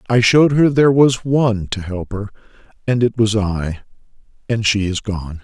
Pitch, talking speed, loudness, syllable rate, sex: 110 Hz, 190 wpm, -16 LUFS, 5.2 syllables/s, male